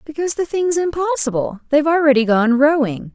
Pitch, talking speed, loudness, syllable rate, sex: 285 Hz, 155 wpm, -17 LUFS, 5.8 syllables/s, female